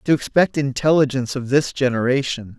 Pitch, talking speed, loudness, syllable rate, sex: 135 Hz, 140 wpm, -19 LUFS, 5.6 syllables/s, male